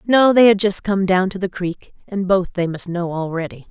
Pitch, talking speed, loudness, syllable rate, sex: 190 Hz, 245 wpm, -18 LUFS, 4.9 syllables/s, female